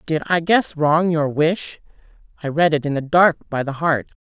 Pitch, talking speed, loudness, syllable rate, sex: 155 Hz, 200 wpm, -18 LUFS, 4.7 syllables/s, female